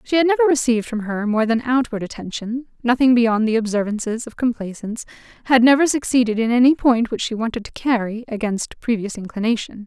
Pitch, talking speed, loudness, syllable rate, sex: 235 Hz, 185 wpm, -19 LUFS, 6.0 syllables/s, female